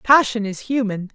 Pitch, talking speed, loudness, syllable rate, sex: 225 Hz, 160 wpm, -20 LUFS, 4.8 syllables/s, male